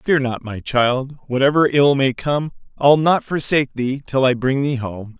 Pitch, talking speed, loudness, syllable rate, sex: 135 Hz, 195 wpm, -18 LUFS, 4.4 syllables/s, male